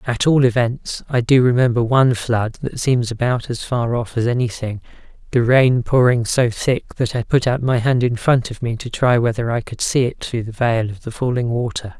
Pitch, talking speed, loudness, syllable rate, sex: 120 Hz, 220 wpm, -18 LUFS, 5.0 syllables/s, male